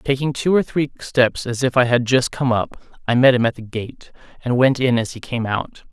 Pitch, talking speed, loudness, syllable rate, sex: 125 Hz, 265 wpm, -19 LUFS, 5.1 syllables/s, male